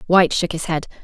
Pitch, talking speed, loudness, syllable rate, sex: 170 Hz, 235 wpm, -19 LUFS, 6.9 syllables/s, female